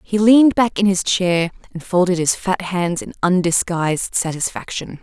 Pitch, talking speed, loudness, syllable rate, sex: 185 Hz, 165 wpm, -17 LUFS, 4.7 syllables/s, female